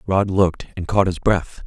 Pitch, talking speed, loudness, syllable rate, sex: 95 Hz, 215 wpm, -19 LUFS, 4.9 syllables/s, male